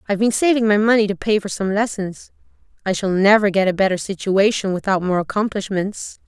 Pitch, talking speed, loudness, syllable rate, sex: 200 Hz, 190 wpm, -18 LUFS, 5.8 syllables/s, female